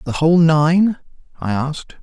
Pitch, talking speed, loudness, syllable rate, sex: 160 Hz, 150 wpm, -16 LUFS, 4.7 syllables/s, male